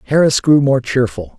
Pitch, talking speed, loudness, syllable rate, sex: 125 Hz, 175 wpm, -14 LUFS, 5.1 syllables/s, male